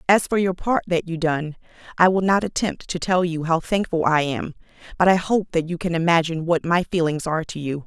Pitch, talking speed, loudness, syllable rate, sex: 170 Hz, 235 wpm, -21 LUFS, 5.6 syllables/s, female